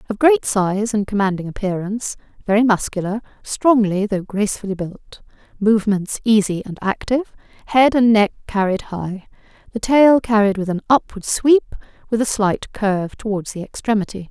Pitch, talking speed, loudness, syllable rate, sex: 210 Hz, 145 wpm, -18 LUFS, 5.1 syllables/s, female